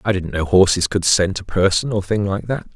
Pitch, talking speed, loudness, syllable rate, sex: 100 Hz, 260 wpm, -18 LUFS, 5.3 syllables/s, male